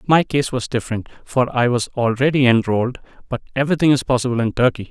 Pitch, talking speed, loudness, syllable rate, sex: 125 Hz, 185 wpm, -19 LUFS, 6.4 syllables/s, male